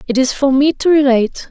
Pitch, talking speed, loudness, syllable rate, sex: 270 Hz, 240 wpm, -13 LUFS, 5.9 syllables/s, female